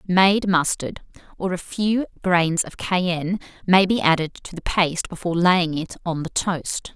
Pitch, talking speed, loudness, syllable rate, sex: 175 Hz, 175 wpm, -21 LUFS, 4.4 syllables/s, female